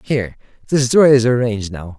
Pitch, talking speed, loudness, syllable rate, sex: 120 Hz, 180 wpm, -15 LUFS, 6.4 syllables/s, male